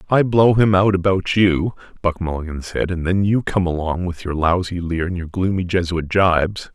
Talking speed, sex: 205 wpm, male